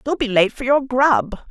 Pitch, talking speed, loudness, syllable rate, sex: 245 Hz, 240 wpm, -17 LUFS, 4.4 syllables/s, female